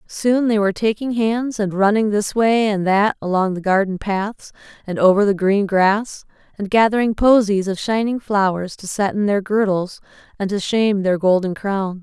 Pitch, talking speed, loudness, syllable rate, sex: 205 Hz, 185 wpm, -18 LUFS, 4.7 syllables/s, female